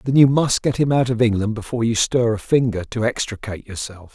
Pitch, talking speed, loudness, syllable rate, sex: 115 Hz, 230 wpm, -19 LUFS, 6.1 syllables/s, male